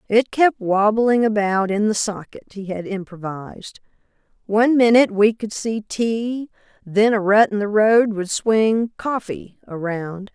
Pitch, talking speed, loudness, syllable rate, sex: 210 Hz, 150 wpm, -19 LUFS, 4.1 syllables/s, female